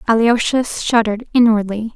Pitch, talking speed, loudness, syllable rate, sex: 225 Hz, 90 wpm, -16 LUFS, 5.3 syllables/s, female